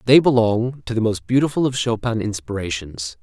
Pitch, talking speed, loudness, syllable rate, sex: 115 Hz, 170 wpm, -20 LUFS, 5.3 syllables/s, male